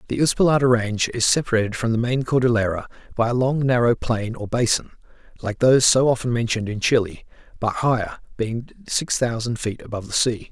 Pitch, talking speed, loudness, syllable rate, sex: 120 Hz, 185 wpm, -21 LUFS, 6.0 syllables/s, male